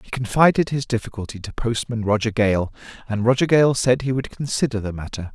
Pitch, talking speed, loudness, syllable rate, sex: 115 Hz, 190 wpm, -21 LUFS, 5.7 syllables/s, male